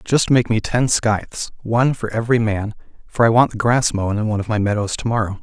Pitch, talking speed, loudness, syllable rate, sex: 110 Hz, 245 wpm, -18 LUFS, 6.0 syllables/s, male